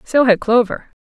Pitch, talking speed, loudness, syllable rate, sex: 230 Hz, 175 wpm, -15 LUFS, 4.8 syllables/s, female